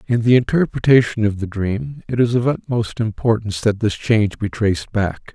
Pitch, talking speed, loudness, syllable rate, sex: 110 Hz, 190 wpm, -18 LUFS, 5.3 syllables/s, male